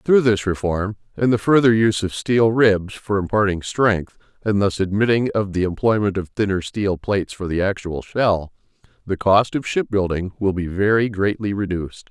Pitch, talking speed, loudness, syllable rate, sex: 100 Hz, 180 wpm, -20 LUFS, 4.9 syllables/s, male